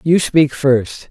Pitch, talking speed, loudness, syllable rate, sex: 145 Hz, 165 wpm, -14 LUFS, 3.0 syllables/s, male